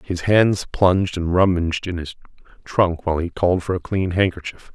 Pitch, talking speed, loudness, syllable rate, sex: 90 Hz, 190 wpm, -20 LUFS, 5.4 syllables/s, male